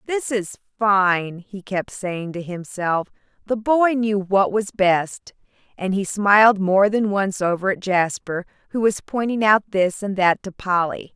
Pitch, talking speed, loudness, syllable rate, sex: 200 Hz, 170 wpm, -20 LUFS, 4.0 syllables/s, female